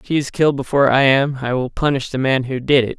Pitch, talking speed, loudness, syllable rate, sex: 135 Hz, 300 wpm, -17 LUFS, 6.7 syllables/s, male